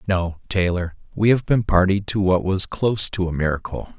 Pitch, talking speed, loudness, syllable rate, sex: 95 Hz, 195 wpm, -21 LUFS, 5.2 syllables/s, male